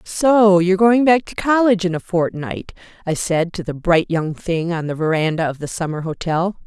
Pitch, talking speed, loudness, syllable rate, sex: 180 Hz, 205 wpm, -18 LUFS, 5.0 syllables/s, female